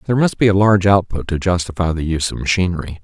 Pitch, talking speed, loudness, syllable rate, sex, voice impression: 90 Hz, 235 wpm, -17 LUFS, 7.3 syllables/s, male, very masculine, very adult-like, slightly thick, cool, sincere, slightly calm, slightly friendly, slightly elegant